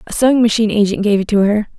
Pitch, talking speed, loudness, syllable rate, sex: 215 Hz, 270 wpm, -14 LUFS, 7.5 syllables/s, female